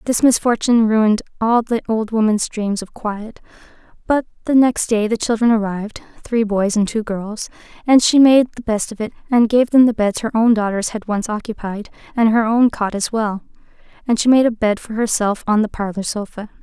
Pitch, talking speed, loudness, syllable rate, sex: 220 Hz, 200 wpm, -17 LUFS, 5.2 syllables/s, female